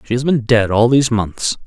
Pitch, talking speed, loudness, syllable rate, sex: 115 Hz, 250 wpm, -15 LUFS, 5.3 syllables/s, male